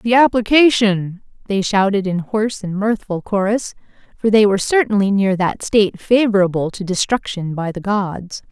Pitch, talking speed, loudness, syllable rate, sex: 205 Hz, 155 wpm, -17 LUFS, 4.9 syllables/s, female